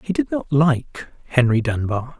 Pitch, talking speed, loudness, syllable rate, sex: 140 Hz, 165 wpm, -20 LUFS, 4.2 syllables/s, male